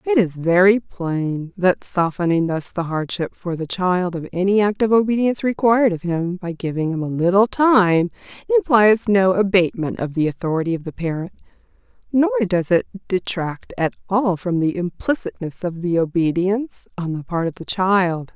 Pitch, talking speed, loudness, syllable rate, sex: 185 Hz, 175 wpm, -19 LUFS, 4.9 syllables/s, female